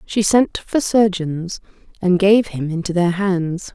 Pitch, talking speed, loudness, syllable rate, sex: 190 Hz, 160 wpm, -18 LUFS, 3.7 syllables/s, female